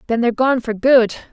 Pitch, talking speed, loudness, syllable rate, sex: 240 Hz, 275 wpm, -16 LUFS, 7.0 syllables/s, female